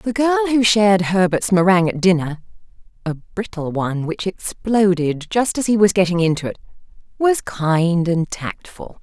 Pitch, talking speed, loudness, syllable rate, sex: 190 Hz, 160 wpm, -18 LUFS, 3.0 syllables/s, female